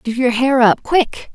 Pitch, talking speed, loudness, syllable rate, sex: 250 Hz, 180 wpm, -15 LUFS, 3.8 syllables/s, female